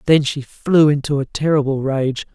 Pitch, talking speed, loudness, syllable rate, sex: 140 Hz, 180 wpm, -17 LUFS, 4.7 syllables/s, male